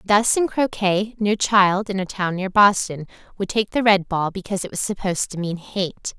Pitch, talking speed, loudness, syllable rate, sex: 195 Hz, 215 wpm, -20 LUFS, 4.6 syllables/s, female